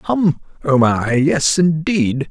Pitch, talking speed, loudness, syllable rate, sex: 150 Hz, 130 wpm, -16 LUFS, 3.0 syllables/s, male